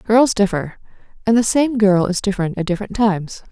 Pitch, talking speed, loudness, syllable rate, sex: 205 Hz, 190 wpm, -17 LUFS, 5.7 syllables/s, female